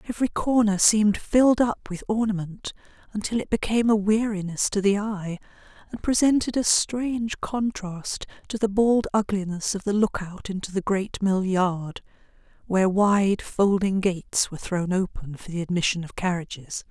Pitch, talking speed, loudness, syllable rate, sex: 200 Hz, 160 wpm, -24 LUFS, 4.9 syllables/s, female